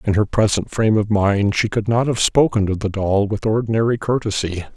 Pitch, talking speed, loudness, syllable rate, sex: 105 Hz, 215 wpm, -18 LUFS, 5.5 syllables/s, male